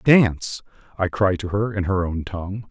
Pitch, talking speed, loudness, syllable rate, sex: 95 Hz, 200 wpm, -22 LUFS, 4.8 syllables/s, male